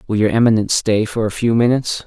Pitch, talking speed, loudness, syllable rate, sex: 110 Hz, 235 wpm, -16 LUFS, 6.8 syllables/s, male